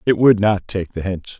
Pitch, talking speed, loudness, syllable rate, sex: 100 Hz, 260 wpm, -18 LUFS, 4.7 syllables/s, male